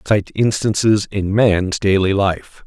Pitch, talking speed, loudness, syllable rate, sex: 100 Hz, 135 wpm, -16 LUFS, 3.6 syllables/s, male